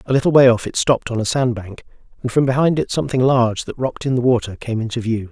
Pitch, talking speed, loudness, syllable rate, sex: 120 Hz, 270 wpm, -18 LUFS, 6.9 syllables/s, male